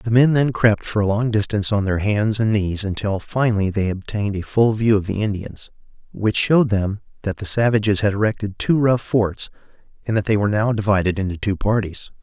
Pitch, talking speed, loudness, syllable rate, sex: 105 Hz, 210 wpm, -19 LUFS, 5.6 syllables/s, male